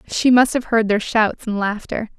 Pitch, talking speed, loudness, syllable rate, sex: 220 Hz, 220 wpm, -18 LUFS, 4.6 syllables/s, female